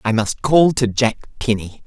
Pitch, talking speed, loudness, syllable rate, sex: 120 Hz, 195 wpm, -18 LUFS, 4.6 syllables/s, male